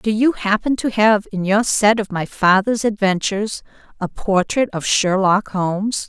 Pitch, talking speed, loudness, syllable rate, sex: 205 Hz, 170 wpm, -18 LUFS, 4.5 syllables/s, female